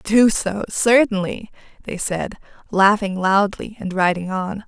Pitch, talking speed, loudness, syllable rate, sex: 200 Hz, 130 wpm, -19 LUFS, 4.0 syllables/s, female